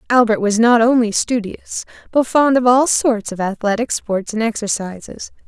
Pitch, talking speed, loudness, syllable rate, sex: 230 Hz, 165 wpm, -16 LUFS, 4.7 syllables/s, female